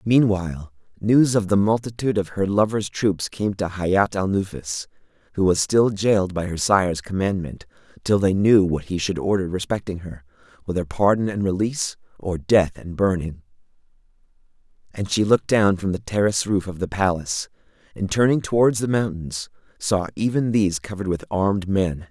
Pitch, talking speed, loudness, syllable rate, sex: 95 Hz, 170 wpm, -21 LUFS, 5.2 syllables/s, male